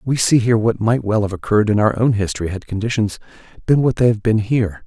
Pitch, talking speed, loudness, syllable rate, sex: 110 Hz, 245 wpm, -17 LUFS, 6.5 syllables/s, male